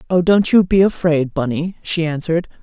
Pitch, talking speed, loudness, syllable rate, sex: 170 Hz, 185 wpm, -16 LUFS, 5.3 syllables/s, female